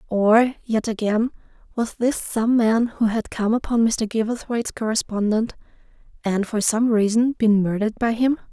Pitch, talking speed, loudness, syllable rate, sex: 225 Hz, 140 wpm, -21 LUFS, 4.7 syllables/s, female